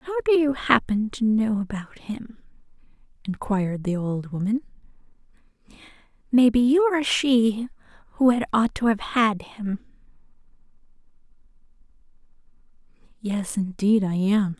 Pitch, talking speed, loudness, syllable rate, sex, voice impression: 225 Hz, 115 wpm, -23 LUFS, 4.5 syllables/s, female, feminine, adult-like, slightly soft, calm, slightly elegant, slightly sweet, kind